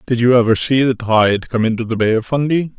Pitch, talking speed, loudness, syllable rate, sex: 120 Hz, 260 wpm, -15 LUFS, 5.7 syllables/s, male